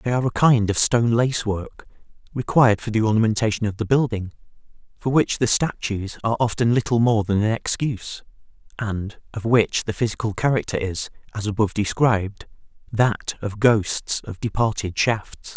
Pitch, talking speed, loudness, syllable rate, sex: 110 Hz, 160 wpm, -21 LUFS, 5.2 syllables/s, male